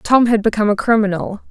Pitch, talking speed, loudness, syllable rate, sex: 215 Hz, 200 wpm, -16 LUFS, 6.4 syllables/s, female